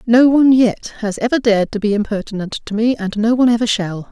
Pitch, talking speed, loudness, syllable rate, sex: 220 Hz, 235 wpm, -16 LUFS, 6.2 syllables/s, female